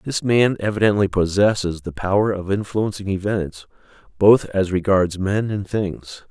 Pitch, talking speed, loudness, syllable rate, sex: 100 Hz, 145 wpm, -19 LUFS, 4.5 syllables/s, male